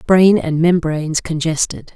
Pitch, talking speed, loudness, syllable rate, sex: 165 Hz, 125 wpm, -16 LUFS, 4.4 syllables/s, female